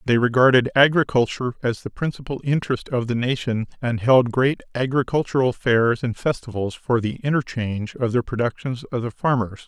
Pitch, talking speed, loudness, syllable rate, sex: 125 Hz, 160 wpm, -21 LUFS, 5.5 syllables/s, male